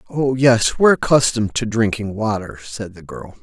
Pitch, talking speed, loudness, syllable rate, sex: 115 Hz, 175 wpm, -17 LUFS, 5.2 syllables/s, male